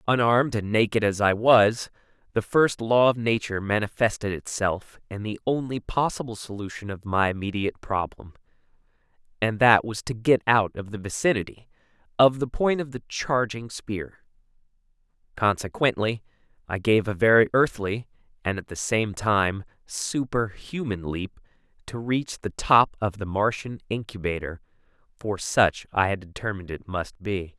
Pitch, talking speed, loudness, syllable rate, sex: 110 Hz, 145 wpm, -24 LUFS, 4.8 syllables/s, male